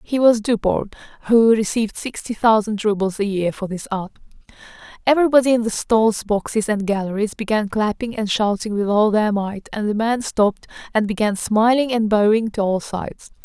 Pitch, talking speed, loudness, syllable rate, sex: 215 Hz, 180 wpm, -19 LUFS, 4.5 syllables/s, female